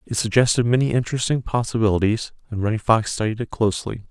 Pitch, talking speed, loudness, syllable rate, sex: 115 Hz, 160 wpm, -21 LUFS, 6.6 syllables/s, male